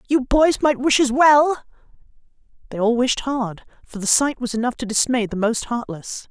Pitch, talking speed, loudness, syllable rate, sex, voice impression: 250 Hz, 190 wpm, -19 LUFS, 4.7 syllables/s, female, feminine, adult-like, slightly tensed, powerful, clear, fluent, intellectual, slightly elegant, strict, intense, sharp